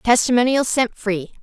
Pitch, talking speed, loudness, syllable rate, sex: 230 Hz, 125 wpm, -18 LUFS, 4.6 syllables/s, female